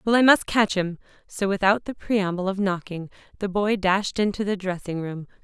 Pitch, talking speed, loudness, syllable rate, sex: 195 Hz, 200 wpm, -23 LUFS, 5.0 syllables/s, female